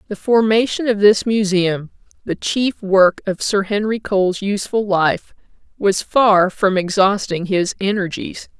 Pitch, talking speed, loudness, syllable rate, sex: 200 Hz, 140 wpm, -17 LUFS, 4.2 syllables/s, female